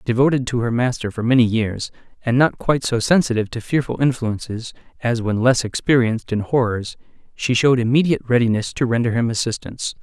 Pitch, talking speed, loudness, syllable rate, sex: 120 Hz, 175 wpm, -19 LUFS, 6.0 syllables/s, male